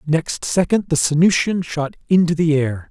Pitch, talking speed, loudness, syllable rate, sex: 160 Hz, 165 wpm, -18 LUFS, 4.5 syllables/s, male